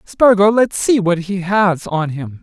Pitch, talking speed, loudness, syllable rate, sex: 190 Hz, 200 wpm, -15 LUFS, 3.9 syllables/s, male